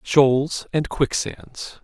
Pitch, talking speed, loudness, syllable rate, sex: 140 Hz, 100 wpm, -21 LUFS, 2.4 syllables/s, male